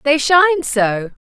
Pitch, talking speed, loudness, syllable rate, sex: 280 Hz, 140 wpm, -14 LUFS, 4.7 syllables/s, female